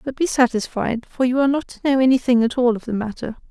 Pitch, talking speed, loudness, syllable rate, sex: 250 Hz, 255 wpm, -19 LUFS, 6.5 syllables/s, female